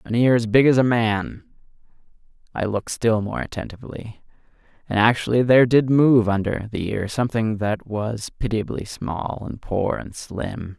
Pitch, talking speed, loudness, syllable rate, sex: 110 Hz, 155 wpm, -21 LUFS, 4.7 syllables/s, male